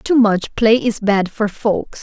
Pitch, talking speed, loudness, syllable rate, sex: 215 Hz, 205 wpm, -16 LUFS, 3.5 syllables/s, female